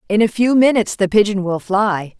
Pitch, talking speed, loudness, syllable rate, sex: 205 Hz, 220 wpm, -16 LUFS, 5.5 syllables/s, female